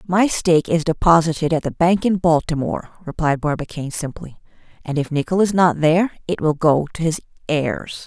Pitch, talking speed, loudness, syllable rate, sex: 160 Hz, 180 wpm, -19 LUFS, 5.5 syllables/s, female